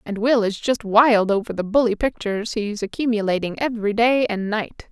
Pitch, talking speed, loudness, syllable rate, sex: 220 Hz, 185 wpm, -20 LUFS, 5.3 syllables/s, female